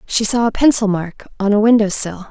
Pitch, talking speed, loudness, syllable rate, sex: 210 Hz, 235 wpm, -15 LUFS, 5.4 syllables/s, female